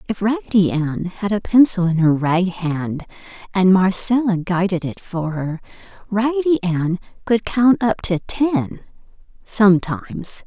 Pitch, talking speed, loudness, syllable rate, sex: 195 Hz, 130 wpm, -18 LUFS, 4.2 syllables/s, female